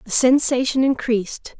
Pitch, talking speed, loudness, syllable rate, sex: 245 Hz, 115 wpm, -18 LUFS, 4.8 syllables/s, female